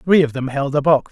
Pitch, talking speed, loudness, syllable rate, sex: 145 Hz, 325 wpm, -18 LUFS, 5.6 syllables/s, male